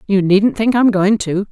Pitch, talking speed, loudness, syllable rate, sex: 205 Hz, 240 wpm, -14 LUFS, 4.5 syllables/s, female